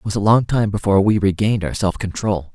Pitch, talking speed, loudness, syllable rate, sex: 100 Hz, 260 wpm, -18 LUFS, 6.4 syllables/s, male